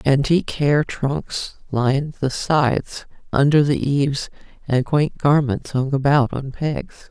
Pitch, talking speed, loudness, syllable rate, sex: 140 Hz, 135 wpm, -20 LUFS, 4.0 syllables/s, female